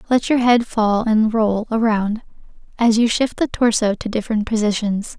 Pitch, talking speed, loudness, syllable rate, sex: 220 Hz, 175 wpm, -18 LUFS, 4.8 syllables/s, female